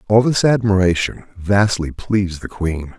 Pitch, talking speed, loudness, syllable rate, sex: 100 Hz, 140 wpm, -17 LUFS, 4.5 syllables/s, male